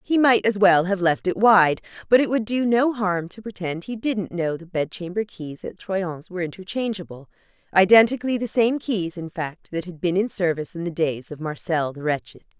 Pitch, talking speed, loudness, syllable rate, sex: 190 Hz, 210 wpm, -22 LUFS, 5.2 syllables/s, female